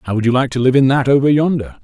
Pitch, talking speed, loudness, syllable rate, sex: 130 Hz, 330 wpm, -14 LUFS, 6.7 syllables/s, male